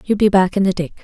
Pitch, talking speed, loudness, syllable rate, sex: 195 Hz, 350 wpm, -16 LUFS, 6.5 syllables/s, female